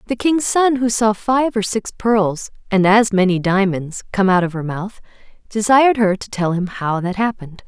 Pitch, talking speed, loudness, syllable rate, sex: 205 Hz, 205 wpm, -17 LUFS, 4.8 syllables/s, female